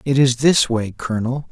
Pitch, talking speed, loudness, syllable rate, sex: 125 Hz, 200 wpm, -18 LUFS, 5.1 syllables/s, male